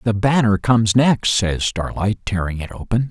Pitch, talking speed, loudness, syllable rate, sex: 110 Hz, 175 wpm, -18 LUFS, 4.7 syllables/s, male